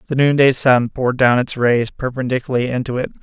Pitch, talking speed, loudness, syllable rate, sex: 125 Hz, 185 wpm, -16 LUFS, 6.2 syllables/s, male